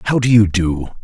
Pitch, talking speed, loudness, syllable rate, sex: 100 Hz, 235 wpm, -15 LUFS, 5.7 syllables/s, male